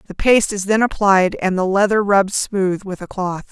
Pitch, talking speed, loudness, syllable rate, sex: 195 Hz, 220 wpm, -17 LUFS, 5.2 syllables/s, female